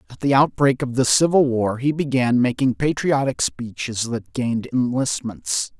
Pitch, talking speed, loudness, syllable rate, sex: 130 Hz, 155 wpm, -20 LUFS, 4.6 syllables/s, male